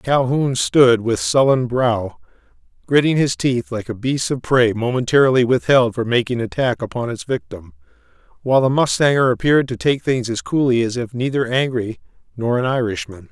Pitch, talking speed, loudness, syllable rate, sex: 125 Hz, 165 wpm, -18 LUFS, 5.1 syllables/s, male